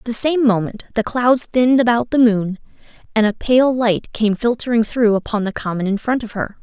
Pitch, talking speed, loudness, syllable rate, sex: 230 Hz, 210 wpm, -17 LUFS, 5.2 syllables/s, female